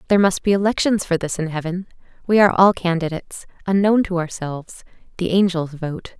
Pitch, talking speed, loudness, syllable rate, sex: 180 Hz, 175 wpm, -19 LUFS, 5.9 syllables/s, female